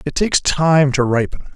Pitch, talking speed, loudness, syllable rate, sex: 145 Hz, 195 wpm, -16 LUFS, 5.4 syllables/s, male